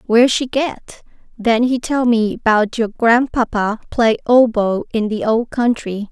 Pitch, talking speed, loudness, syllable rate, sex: 230 Hz, 155 wpm, -16 LUFS, 3.9 syllables/s, female